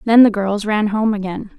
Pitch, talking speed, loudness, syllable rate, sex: 210 Hz, 225 wpm, -17 LUFS, 5.0 syllables/s, female